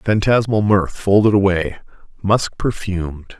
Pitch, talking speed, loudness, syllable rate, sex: 100 Hz, 90 wpm, -17 LUFS, 4.4 syllables/s, male